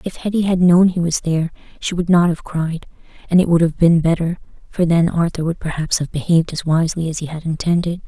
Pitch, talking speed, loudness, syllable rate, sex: 170 Hz, 230 wpm, -17 LUFS, 6.0 syllables/s, female